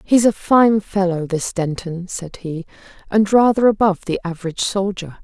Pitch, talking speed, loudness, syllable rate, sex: 190 Hz, 160 wpm, -18 LUFS, 5.0 syllables/s, female